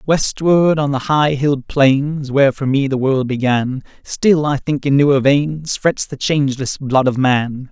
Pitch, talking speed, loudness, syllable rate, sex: 140 Hz, 185 wpm, -16 LUFS, 4.2 syllables/s, male